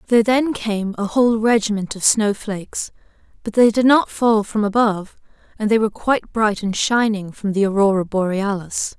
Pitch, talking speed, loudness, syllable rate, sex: 210 Hz, 180 wpm, -18 LUFS, 5.3 syllables/s, female